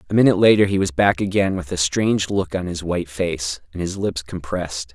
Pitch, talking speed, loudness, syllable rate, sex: 90 Hz, 230 wpm, -20 LUFS, 5.8 syllables/s, male